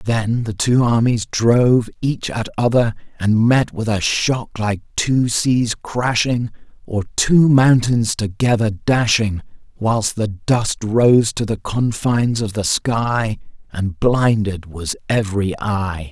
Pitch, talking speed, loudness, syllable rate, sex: 110 Hz, 140 wpm, -18 LUFS, 3.5 syllables/s, male